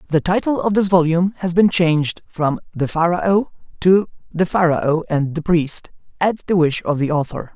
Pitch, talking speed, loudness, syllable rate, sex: 170 Hz, 185 wpm, -18 LUFS, 4.8 syllables/s, male